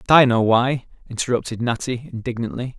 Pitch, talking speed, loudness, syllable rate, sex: 120 Hz, 150 wpm, -20 LUFS, 5.9 syllables/s, male